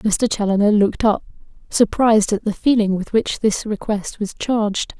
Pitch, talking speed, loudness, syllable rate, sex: 215 Hz, 170 wpm, -18 LUFS, 4.9 syllables/s, female